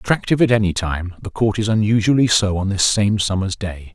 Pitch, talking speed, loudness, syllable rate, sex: 105 Hz, 215 wpm, -18 LUFS, 5.8 syllables/s, male